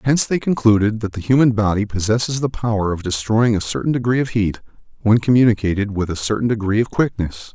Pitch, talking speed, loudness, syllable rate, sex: 110 Hz, 200 wpm, -18 LUFS, 6.1 syllables/s, male